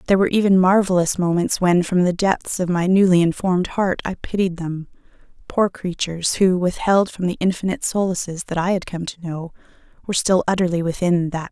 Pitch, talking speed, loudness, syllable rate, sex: 180 Hz, 180 wpm, -19 LUFS, 5.8 syllables/s, female